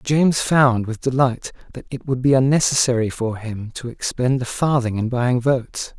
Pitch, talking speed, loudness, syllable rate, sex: 125 Hz, 180 wpm, -19 LUFS, 4.8 syllables/s, male